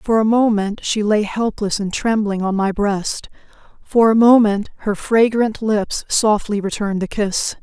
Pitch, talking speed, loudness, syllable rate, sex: 210 Hz, 165 wpm, -17 LUFS, 4.2 syllables/s, female